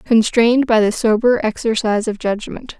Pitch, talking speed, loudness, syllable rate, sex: 225 Hz, 150 wpm, -16 LUFS, 5.1 syllables/s, female